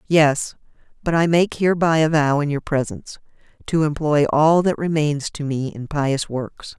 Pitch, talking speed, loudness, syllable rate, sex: 150 Hz, 175 wpm, -19 LUFS, 4.6 syllables/s, female